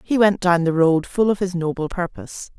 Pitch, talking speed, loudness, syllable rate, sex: 175 Hz, 230 wpm, -19 LUFS, 5.3 syllables/s, female